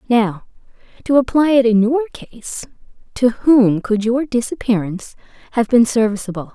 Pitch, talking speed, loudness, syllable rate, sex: 235 Hz, 130 wpm, -16 LUFS, 4.7 syllables/s, female